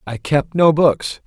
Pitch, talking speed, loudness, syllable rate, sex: 150 Hz, 190 wpm, -16 LUFS, 3.6 syllables/s, male